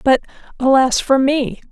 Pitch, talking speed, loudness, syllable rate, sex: 265 Hz, 140 wpm, -16 LUFS, 4.3 syllables/s, female